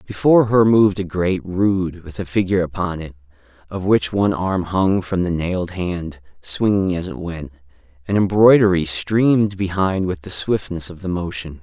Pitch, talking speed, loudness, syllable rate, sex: 90 Hz, 175 wpm, -19 LUFS, 4.9 syllables/s, male